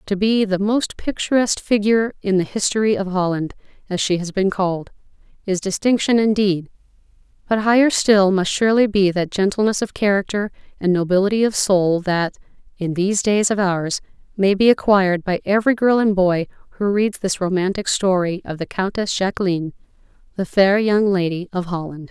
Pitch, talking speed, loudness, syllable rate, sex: 195 Hz, 170 wpm, -19 LUFS, 5.4 syllables/s, female